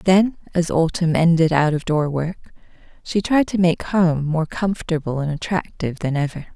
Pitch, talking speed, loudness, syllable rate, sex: 165 Hz, 175 wpm, -20 LUFS, 4.8 syllables/s, female